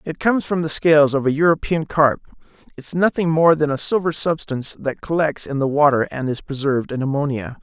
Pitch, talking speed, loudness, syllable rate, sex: 150 Hz, 205 wpm, -19 LUFS, 5.8 syllables/s, male